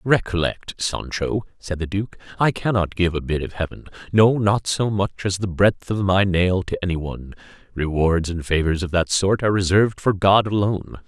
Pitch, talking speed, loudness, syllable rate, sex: 95 Hz, 190 wpm, -21 LUFS, 5.0 syllables/s, male